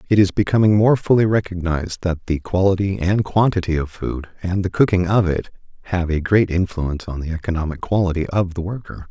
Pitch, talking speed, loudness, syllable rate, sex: 90 Hz, 190 wpm, -19 LUFS, 5.7 syllables/s, male